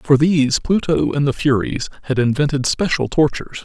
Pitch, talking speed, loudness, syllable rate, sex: 140 Hz, 165 wpm, -18 LUFS, 5.3 syllables/s, male